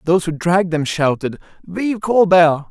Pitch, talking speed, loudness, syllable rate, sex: 175 Hz, 155 wpm, -16 LUFS, 4.7 syllables/s, male